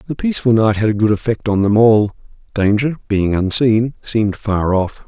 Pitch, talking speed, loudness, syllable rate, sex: 110 Hz, 190 wpm, -16 LUFS, 5.1 syllables/s, male